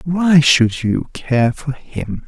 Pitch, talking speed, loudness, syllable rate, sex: 140 Hz, 160 wpm, -16 LUFS, 2.8 syllables/s, male